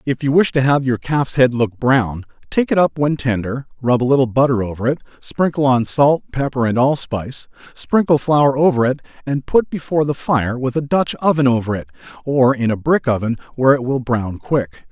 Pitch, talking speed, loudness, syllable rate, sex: 130 Hz, 205 wpm, -17 LUFS, 5.2 syllables/s, male